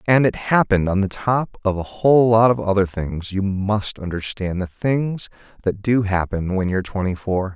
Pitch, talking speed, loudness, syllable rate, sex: 100 Hz, 200 wpm, -20 LUFS, 4.9 syllables/s, male